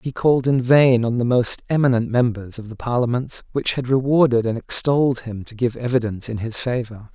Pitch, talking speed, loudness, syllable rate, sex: 120 Hz, 200 wpm, -20 LUFS, 5.5 syllables/s, male